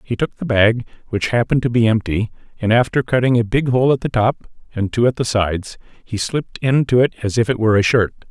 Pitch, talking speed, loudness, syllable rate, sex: 115 Hz, 240 wpm, -17 LUFS, 6.0 syllables/s, male